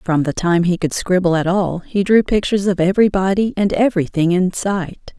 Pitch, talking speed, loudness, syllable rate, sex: 185 Hz, 195 wpm, -17 LUFS, 5.4 syllables/s, female